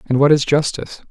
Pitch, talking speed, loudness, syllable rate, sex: 140 Hz, 215 wpm, -16 LUFS, 6.5 syllables/s, male